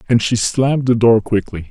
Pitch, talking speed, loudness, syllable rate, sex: 115 Hz, 210 wpm, -15 LUFS, 5.3 syllables/s, male